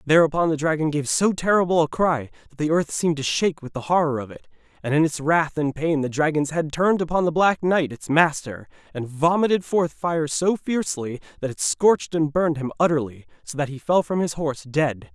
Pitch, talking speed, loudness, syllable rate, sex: 155 Hz, 220 wpm, -22 LUFS, 5.6 syllables/s, male